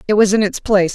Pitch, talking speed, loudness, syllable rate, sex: 205 Hz, 315 wpm, -15 LUFS, 7.1 syllables/s, female